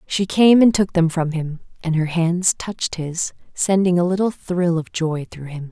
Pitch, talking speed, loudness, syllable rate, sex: 175 Hz, 210 wpm, -19 LUFS, 4.5 syllables/s, female